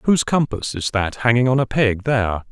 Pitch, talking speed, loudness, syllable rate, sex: 120 Hz, 215 wpm, -19 LUFS, 5.7 syllables/s, male